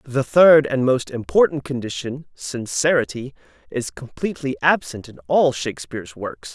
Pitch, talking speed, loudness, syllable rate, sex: 135 Hz, 130 wpm, -20 LUFS, 4.7 syllables/s, male